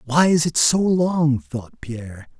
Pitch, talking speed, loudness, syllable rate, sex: 145 Hz, 175 wpm, -18 LUFS, 3.9 syllables/s, male